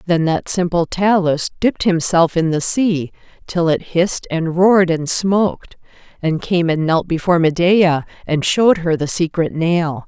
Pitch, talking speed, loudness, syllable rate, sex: 170 Hz, 165 wpm, -16 LUFS, 4.5 syllables/s, female